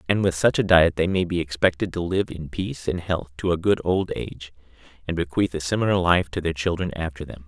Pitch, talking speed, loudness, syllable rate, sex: 85 Hz, 240 wpm, -23 LUFS, 5.9 syllables/s, male